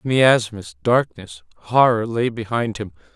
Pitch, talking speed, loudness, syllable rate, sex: 115 Hz, 135 wpm, -19 LUFS, 4.2 syllables/s, male